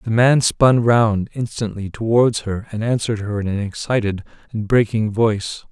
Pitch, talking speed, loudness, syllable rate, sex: 110 Hz, 170 wpm, -18 LUFS, 4.8 syllables/s, male